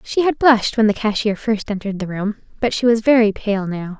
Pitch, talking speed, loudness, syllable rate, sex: 215 Hz, 240 wpm, -18 LUFS, 5.7 syllables/s, female